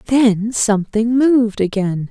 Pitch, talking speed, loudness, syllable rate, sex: 225 Hz, 115 wpm, -16 LUFS, 4.2 syllables/s, female